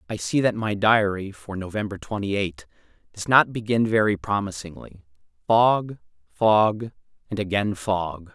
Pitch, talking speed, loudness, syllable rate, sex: 100 Hz, 135 wpm, -23 LUFS, 4.4 syllables/s, male